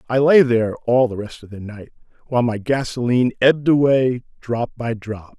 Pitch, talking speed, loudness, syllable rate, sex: 120 Hz, 190 wpm, -18 LUFS, 5.4 syllables/s, male